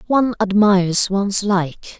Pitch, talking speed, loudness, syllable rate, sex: 200 Hz, 120 wpm, -16 LUFS, 4.5 syllables/s, female